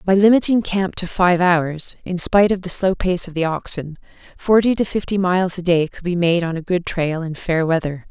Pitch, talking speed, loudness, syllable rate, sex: 180 Hz, 230 wpm, -18 LUFS, 5.2 syllables/s, female